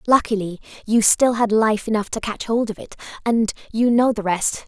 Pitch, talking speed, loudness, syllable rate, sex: 220 Hz, 205 wpm, -19 LUFS, 5.1 syllables/s, female